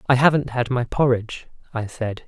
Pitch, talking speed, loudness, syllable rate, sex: 125 Hz, 185 wpm, -21 LUFS, 5.2 syllables/s, male